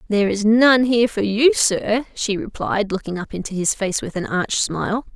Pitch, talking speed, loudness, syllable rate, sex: 210 Hz, 210 wpm, -19 LUFS, 5.0 syllables/s, female